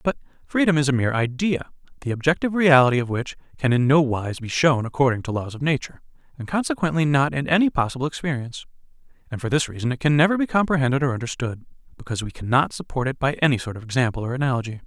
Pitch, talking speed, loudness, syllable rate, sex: 140 Hz, 210 wpm, -22 LUFS, 7.2 syllables/s, male